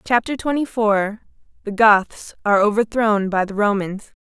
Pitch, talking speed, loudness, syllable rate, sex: 210 Hz, 125 wpm, -18 LUFS, 4.6 syllables/s, female